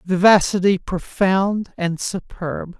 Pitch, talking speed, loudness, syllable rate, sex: 185 Hz, 85 wpm, -19 LUFS, 3.4 syllables/s, male